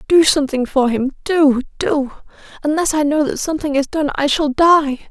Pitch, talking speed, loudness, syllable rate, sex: 290 Hz, 175 wpm, -16 LUFS, 5.2 syllables/s, female